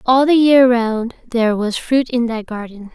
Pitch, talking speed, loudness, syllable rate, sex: 240 Hz, 205 wpm, -15 LUFS, 4.5 syllables/s, female